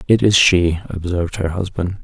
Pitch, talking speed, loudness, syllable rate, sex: 90 Hz, 175 wpm, -17 LUFS, 5.0 syllables/s, male